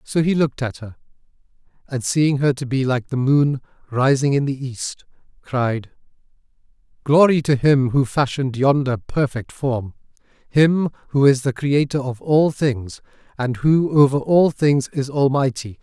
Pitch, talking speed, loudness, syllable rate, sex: 135 Hz, 155 wpm, -19 LUFS, 4.4 syllables/s, male